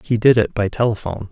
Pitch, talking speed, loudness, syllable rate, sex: 105 Hz, 225 wpm, -18 LUFS, 6.6 syllables/s, male